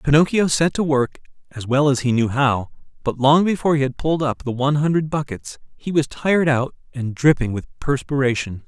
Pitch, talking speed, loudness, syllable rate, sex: 140 Hz, 200 wpm, -20 LUFS, 5.7 syllables/s, male